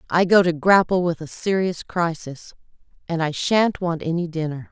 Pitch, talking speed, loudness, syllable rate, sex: 170 Hz, 180 wpm, -21 LUFS, 4.8 syllables/s, female